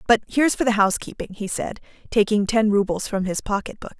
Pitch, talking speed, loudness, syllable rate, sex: 210 Hz, 195 wpm, -22 LUFS, 6.2 syllables/s, female